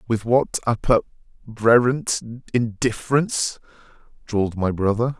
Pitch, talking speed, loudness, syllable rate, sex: 115 Hz, 80 wpm, -21 LUFS, 4.3 syllables/s, male